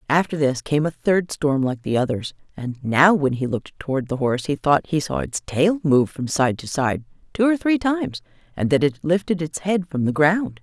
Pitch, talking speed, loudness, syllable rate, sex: 150 Hz, 230 wpm, -21 LUFS, 5.1 syllables/s, female